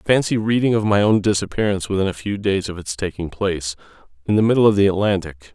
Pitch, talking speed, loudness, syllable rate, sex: 100 Hz, 215 wpm, -19 LUFS, 6.4 syllables/s, male